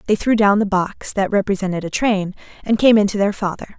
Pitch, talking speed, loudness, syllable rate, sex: 200 Hz, 240 wpm, -18 LUFS, 5.8 syllables/s, female